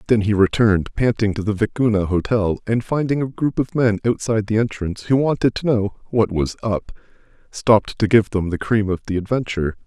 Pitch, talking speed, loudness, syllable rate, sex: 110 Hz, 200 wpm, -19 LUFS, 5.7 syllables/s, male